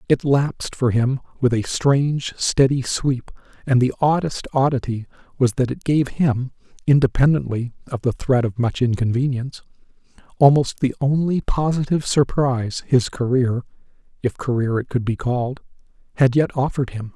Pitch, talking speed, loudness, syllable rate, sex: 130 Hz, 145 wpm, -20 LUFS, 5.0 syllables/s, male